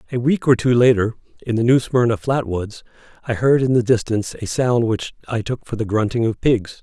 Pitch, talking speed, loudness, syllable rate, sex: 120 Hz, 230 wpm, -19 LUFS, 5.5 syllables/s, male